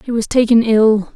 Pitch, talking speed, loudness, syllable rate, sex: 225 Hz, 205 wpm, -13 LUFS, 4.8 syllables/s, female